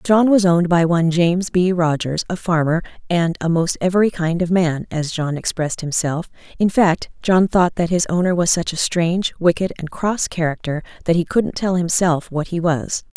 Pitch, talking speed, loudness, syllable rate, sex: 175 Hz, 200 wpm, -18 LUFS, 5.1 syllables/s, female